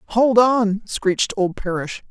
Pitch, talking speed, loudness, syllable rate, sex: 210 Hz, 145 wpm, -19 LUFS, 3.9 syllables/s, female